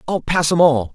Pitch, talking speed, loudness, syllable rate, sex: 155 Hz, 255 wpm, -16 LUFS, 5.1 syllables/s, male